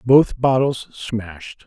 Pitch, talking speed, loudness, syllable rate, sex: 120 Hz, 110 wpm, -19 LUFS, 3.3 syllables/s, male